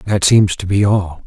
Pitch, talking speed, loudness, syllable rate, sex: 95 Hz, 235 wpm, -14 LUFS, 4.2 syllables/s, male